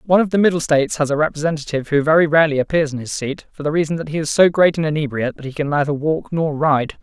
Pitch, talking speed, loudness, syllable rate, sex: 150 Hz, 275 wpm, -18 LUFS, 7.2 syllables/s, male